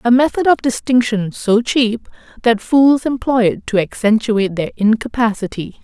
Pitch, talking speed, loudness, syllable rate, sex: 230 Hz, 145 wpm, -15 LUFS, 4.8 syllables/s, female